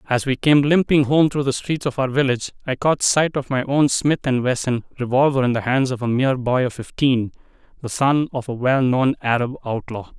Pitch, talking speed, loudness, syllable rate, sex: 130 Hz, 210 wpm, -19 LUFS, 5.4 syllables/s, male